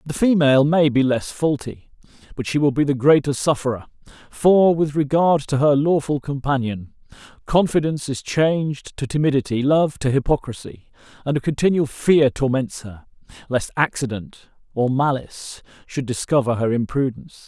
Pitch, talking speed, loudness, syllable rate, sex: 140 Hz, 145 wpm, -20 LUFS, 5.1 syllables/s, male